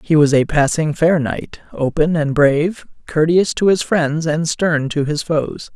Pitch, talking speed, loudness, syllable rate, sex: 155 Hz, 190 wpm, -16 LUFS, 4.1 syllables/s, male